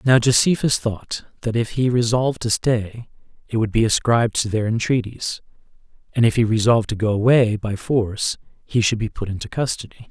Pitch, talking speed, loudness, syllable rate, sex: 115 Hz, 185 wpm, -20 LUFS, 5.4 syllables/s, male